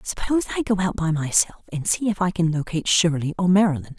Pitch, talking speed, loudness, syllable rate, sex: 180 Hz, 225 wpm, -21 LUFS, 6.4 syllables/s, female